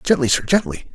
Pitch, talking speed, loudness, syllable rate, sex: 130 Hz, 190 wpm, -18 LUFS, 5.6 syllables/s, male